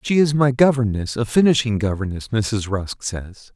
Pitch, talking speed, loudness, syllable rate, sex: 115 Hz, 150 wpm, -19 LUFS, 4.7 syllables/s, male